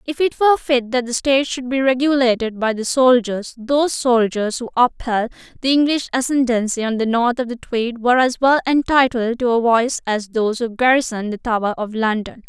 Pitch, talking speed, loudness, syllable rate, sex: 245 Hz, 195 wpm, -18 LUFS, 5.5 syllables/s, female